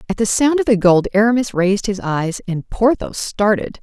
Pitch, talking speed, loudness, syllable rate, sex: 210 Hz, 205 wpm, -17 LUFS, 5.1 syllables/s, female